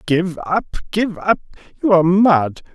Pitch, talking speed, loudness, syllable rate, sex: 180 Hz, 155 wpm, -17 LUFS, 4.5 syllables/s, male